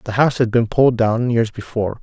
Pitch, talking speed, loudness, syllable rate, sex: 115 Hz, 235 wpm, -17 LUFS, 6.4 syllables/s, male